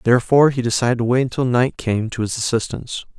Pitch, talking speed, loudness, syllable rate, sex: 120 Hz, 205 wpm, -18 LUFS, 6.8 syllables/s, male